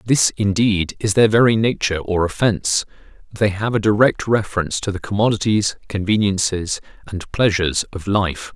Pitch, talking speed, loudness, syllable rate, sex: 100 Hz, 145 wpm, -18 LUFS, 5.2 syllables/s, male